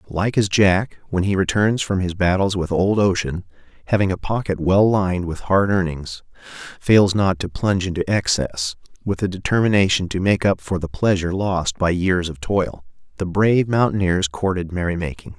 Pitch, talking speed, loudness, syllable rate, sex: 95 Hz, 175 wpm, -20 LUFS, 5.0 syllables/s, male